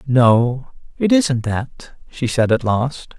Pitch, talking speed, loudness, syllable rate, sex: 130 Hz, 150 wpm, -17 LUFS, 3.0 syllables/s, male